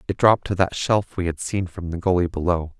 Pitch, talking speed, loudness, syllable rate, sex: 90 Hz, 260 wpm, -22 LUFS, 5.7 syllables/s, male